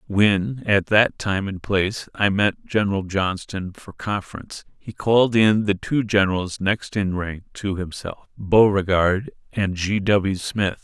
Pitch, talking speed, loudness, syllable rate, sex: 100 Hz, 155 wpm, -21 LUFS, 4.1 syllables/s, male